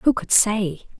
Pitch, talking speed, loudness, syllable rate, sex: 215 Hz, 180 wpm, -19 LUFS, 3.9 syllables/s, female